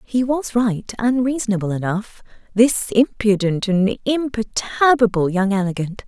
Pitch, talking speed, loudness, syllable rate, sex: 220 Hz, 120 wpm, -19 LUFS, 4.4 syllables/s, female